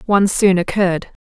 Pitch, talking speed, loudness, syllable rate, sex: 190 Hz, 145 wpm, -16 LUFS, 5.9 syllables/s, female